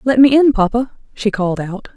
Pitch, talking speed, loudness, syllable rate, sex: 230 Hz, 215 wpm, -15 LUFS, 5.3 syllables/s, female